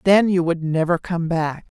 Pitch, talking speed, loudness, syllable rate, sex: 170 Hz, 200 wpm, -20 LUFS, 4.5 syllables/s, female